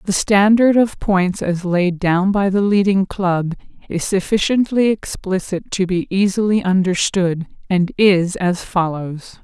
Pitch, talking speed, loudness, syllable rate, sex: 190 Hz, 140 wpm, -17 LUFS, 3.9 syllables/s, female